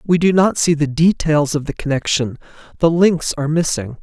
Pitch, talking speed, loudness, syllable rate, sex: 155 Hz, 195 wpm, -16 LUFS, 5.1 syllables/s, male